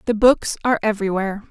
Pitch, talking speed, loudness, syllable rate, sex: 210 Hz, 160 wpm, -19 LUFS, 7.6 syllables/s, female